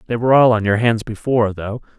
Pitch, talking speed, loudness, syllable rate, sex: 115 Hz, 240 wpm, -16 LUFS, 6.6 syllables/s, male